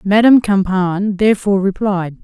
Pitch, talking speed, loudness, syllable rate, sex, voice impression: 195 Hz, 105 wpm, -14 LUFS, 5.2 syllables/s, female, feminine, adult-like, slightly relaxed, slightly weak, muffled, slightly halting, intellectual, calm, friendly, reassuring, elegant, modest